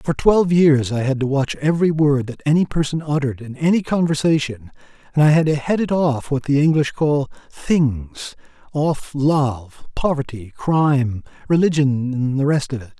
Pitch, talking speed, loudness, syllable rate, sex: 145 Hz, 170 wpm, -19 LUFS, 5.0 syllables/s, male